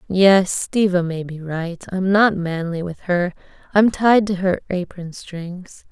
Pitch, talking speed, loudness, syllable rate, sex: 185 Hz, 160 wpm, -19 LUFS, 3.8 syllables/s, female